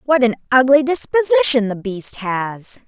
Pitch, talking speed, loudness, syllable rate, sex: 255 Hz, 145 wpm, -16 LUFS, 4.3 syllables/s, female